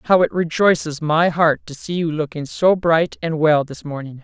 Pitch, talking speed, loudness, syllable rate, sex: 160 Hz, 215 wpm, -18 LUFS, 4.6 syllables/s, female